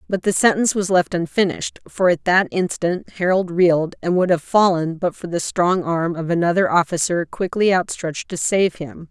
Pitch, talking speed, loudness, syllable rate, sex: 175 Hz, 190 wpm, -19 LUFS, 5.1 syllables/s, female